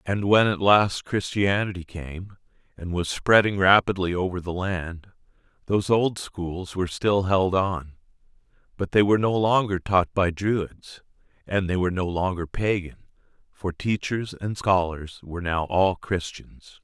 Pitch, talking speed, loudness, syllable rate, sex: 95 Hz, 150 wpm, -24 LUFS, 4.3 syllables/s, male